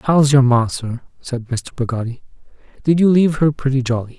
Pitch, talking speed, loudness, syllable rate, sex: 135 Hz, 185 wpm, -17 LUFS, 5.3 syllables/s, male